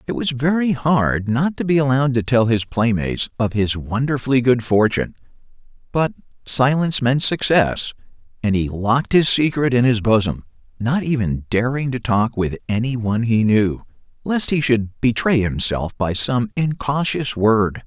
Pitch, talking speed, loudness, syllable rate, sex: 120 Hz, 160 wpm, -19 LUFS, 4.7 syllables/s, male